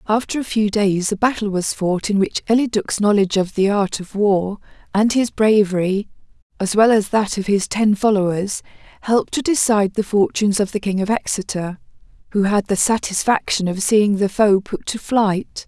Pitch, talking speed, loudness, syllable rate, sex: 205 Hz, 190 wpm, -18 LUFS, 5.1 syllables/s, female